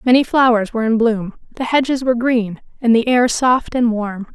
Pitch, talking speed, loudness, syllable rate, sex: 235 Hz, 205 wpm, -16 LUFS, 5.3 syllables/s, female